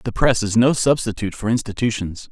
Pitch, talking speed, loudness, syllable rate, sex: 110 Hz, 180 wpm, -19 LUFS, 5.9 syllables/s, male